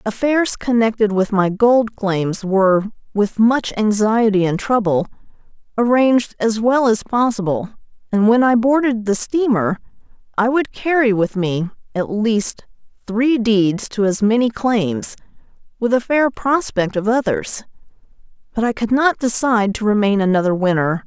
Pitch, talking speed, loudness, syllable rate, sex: 220 Hz, 145 wpm, -17 LUFS, 4.4 syllables/s, female